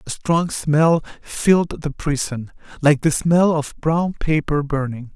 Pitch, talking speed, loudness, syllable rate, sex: 155 Hz, 150 wpm, -19 LUFS, 3.8 syllables/s, male